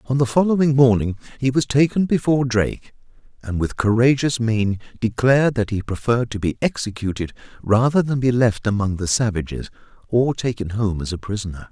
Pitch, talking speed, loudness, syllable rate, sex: 115 Hz, 170 wpm, -20 LUFS, 5.6 syllables/s, male